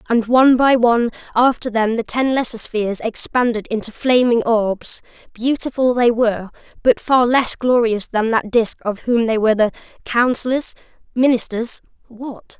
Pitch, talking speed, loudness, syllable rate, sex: 235 Hz, 145 wpm, -17 LUFS, 4.8 syllables/s, female